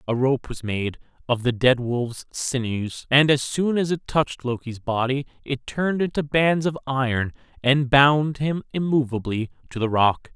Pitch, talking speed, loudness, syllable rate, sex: 135 Hz, 175 wpm, -22 LUFS, 4.6 syllables/s, male